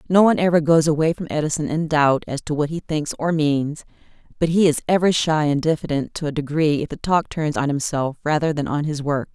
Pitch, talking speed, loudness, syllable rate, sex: 155 Hz, 240 wpm, -20 LUFS, 5.8 syllables/s, female